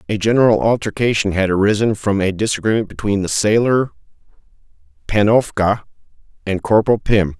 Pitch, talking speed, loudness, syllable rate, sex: 105 Hz, 120 wpm, -17 LUFS, 5.7 syllables/s, male